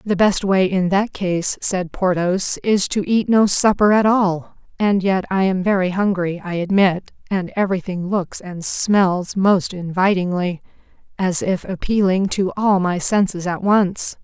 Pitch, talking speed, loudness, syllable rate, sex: 190 Hz, 165 wpm, -18 LUFS, 4.1 syllables/s, female